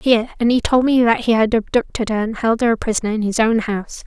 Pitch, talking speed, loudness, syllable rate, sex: 225 Hz, 280 wpm, -17 LUFS, 6.4 syllables/s, female